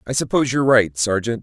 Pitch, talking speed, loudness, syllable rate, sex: 115 Hz, 210 wpm, -18 LUFS, 6.7 syllables/s, male